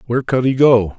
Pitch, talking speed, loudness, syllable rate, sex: 120 Hz, 245 wpm, -14 LUFS, 6.0 syllables/s, male